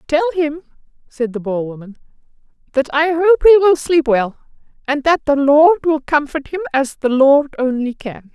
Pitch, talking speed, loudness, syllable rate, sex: 290 Hz, 180 wpm, -15 LUFS, 4.6 syllables/s, female